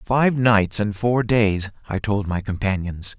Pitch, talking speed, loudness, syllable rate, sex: 105 Hz, 170 wpm, -21 LUFS, 3.8 syllables/s, male